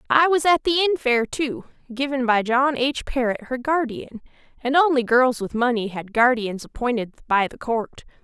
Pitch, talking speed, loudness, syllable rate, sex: 255 Hz, 175 wpm, -21 LUFS, 5.2 syllables/s, female